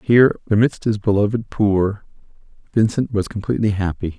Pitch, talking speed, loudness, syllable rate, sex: 105 Hz, 130 wpm, -19 LUFS, 5.6 syllables/s, male